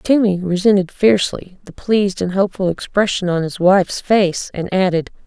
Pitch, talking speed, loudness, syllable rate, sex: 190 Hz, 160 wpm, -17 LUFS, 5.2 syllables/s, female